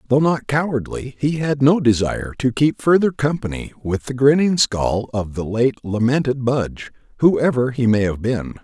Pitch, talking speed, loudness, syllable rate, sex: 125 Hz, 175 wpm, -19 LUFS, 4.8 syllables/s, male